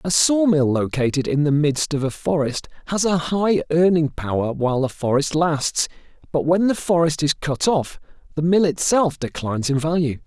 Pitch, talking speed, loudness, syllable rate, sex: 155 Hz, 180 wpm, -20 LUFS, 4.9 syllables/s, male